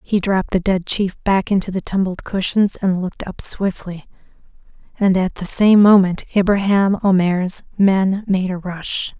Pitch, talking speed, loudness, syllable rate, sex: 190 Hz, 165 wpm, -17 LUFS, 4.5 syllables/s, female